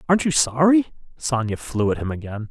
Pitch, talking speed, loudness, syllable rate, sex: 135 Hz, 190 wpm, -21 LUFS, 5.7 syllables/s, male